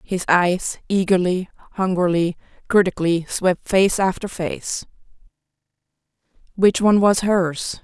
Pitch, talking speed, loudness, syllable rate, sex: 185 Hz, 100 wpm, -19 LUFS, 4.2 syllables/s, female